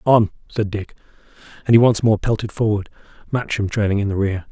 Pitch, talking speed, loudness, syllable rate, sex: 105 Hz, 185 wpm, -19 LUFS, 5.9 syllables/s, male